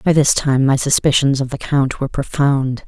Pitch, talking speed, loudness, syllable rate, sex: 140 Hz, 210 wpm, -16 LUFS, 5.1 syllables/s, female